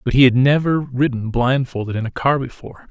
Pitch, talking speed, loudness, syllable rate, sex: 130 Hz, 205 wpm, -18 LUFS, 5.7 syllables/s, male